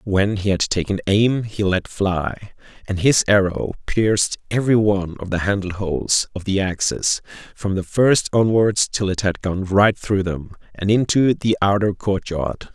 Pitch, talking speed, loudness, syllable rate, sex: 100 Hz, 175 wpm, -19 LUFS, 4.4 syllables/s, male